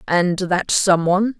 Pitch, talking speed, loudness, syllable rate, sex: 185 Hz, 130 wpm, -18 LUFS, 4.1 syllables/s, female